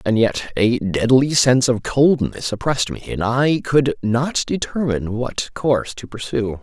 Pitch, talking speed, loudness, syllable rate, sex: 125 Hz, 165 wpm, -19 LUFS, 4.4 syllables/s, male